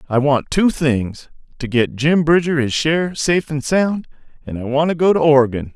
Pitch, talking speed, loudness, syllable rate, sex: 145 Hz, 200 wpm, -17 LUFS, 5.1 syllables/s, male